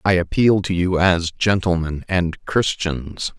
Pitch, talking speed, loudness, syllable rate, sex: 90 Hz, 140 wpm, -19 LUFS, 3.7 syllables/s, male